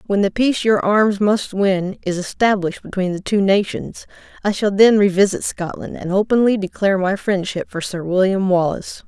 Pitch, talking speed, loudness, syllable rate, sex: 200 Hz, 180 wpm, -18 LUFS, 5.2 syllables/s, female